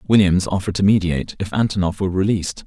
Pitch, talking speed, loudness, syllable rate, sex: 95 Hz, 180 wpm, -19 LUFS, 6.9 syllables/s, male